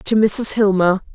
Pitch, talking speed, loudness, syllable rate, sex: 200 Hz, 155 wpm, -15 LUFS, 3.9 syllables/s, female